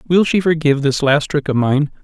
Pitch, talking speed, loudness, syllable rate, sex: 150 Hz, 235 wpm, -16 LUFS, 5.7 syllables/s, male